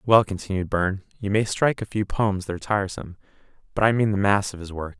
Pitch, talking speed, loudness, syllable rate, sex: 100 Hz, 240 wpm, -24 LUFS, 6.7 syllables/s, male